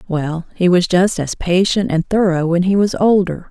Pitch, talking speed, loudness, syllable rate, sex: 180 Hz, 205 wpm, -16 LUFS, 4.7 syllables/s, female